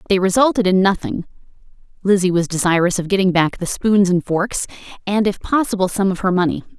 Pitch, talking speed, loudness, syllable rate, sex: 190 Hz, 185 wpm, -17 LUFS, 5.8 syllables/s, female